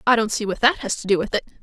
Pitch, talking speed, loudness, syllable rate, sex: 220 Hz, 370 wpm, -21 LUFS, 7.5 syllables/s, female